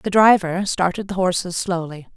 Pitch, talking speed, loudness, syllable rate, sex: 185 Hz, 165 wpm, -19 LUFS, 4.9 syllables/s, female